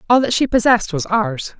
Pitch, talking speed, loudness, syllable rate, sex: 225 Hz, 225 wpm, -16 LUFS, 5.8 syllables/s, female